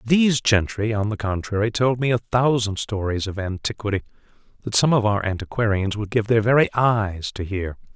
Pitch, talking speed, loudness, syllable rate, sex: 110 Hz, 180 wpm, -21 LUFS, 5.3 syllables/s, male